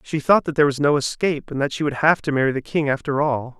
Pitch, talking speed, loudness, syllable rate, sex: 145 Hz, 300 wpm, -20 LUFS, 6.6 syllables/s, male